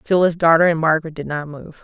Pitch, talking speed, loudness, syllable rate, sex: 160 Hz, 260 wpm, -17 LUFS, 6.4 syllables/s, female